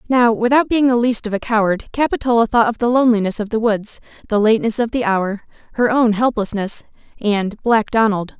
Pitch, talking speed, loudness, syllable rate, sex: 225 Hz, 185 wpm, -17 LUFS, 5.5 syllables/s, female